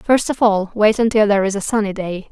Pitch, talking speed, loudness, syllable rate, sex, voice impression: 210 Hz, 260 wpm, -17 LUFS, 5.8 syllables/s, female, feminine, slightly adult-like, slightly cute, slightly calm, slightly friendly